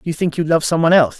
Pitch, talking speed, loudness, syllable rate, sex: 160 Hz, 300 wpm, -16 LUFS, 8.3 syllables/s, male